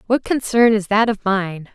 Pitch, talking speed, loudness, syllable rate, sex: 215 Hz, 205 wpm, -17 LUFS, 4.5 syllables/s, female